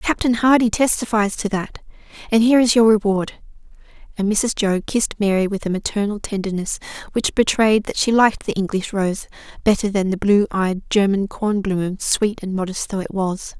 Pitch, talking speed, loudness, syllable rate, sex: 205 Hz, 175 wpm, -19 LUFS, 5.2 syllables/s, female